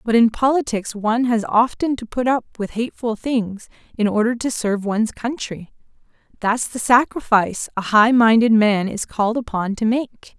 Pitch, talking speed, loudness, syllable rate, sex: 230 Hz, 175 wpm, -19 LUFS, 5.0 syllables/s, female